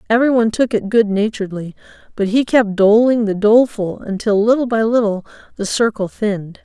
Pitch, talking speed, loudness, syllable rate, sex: 215 Hz, 170 wpm, -16 LUFS, 5.8 syllables/s, female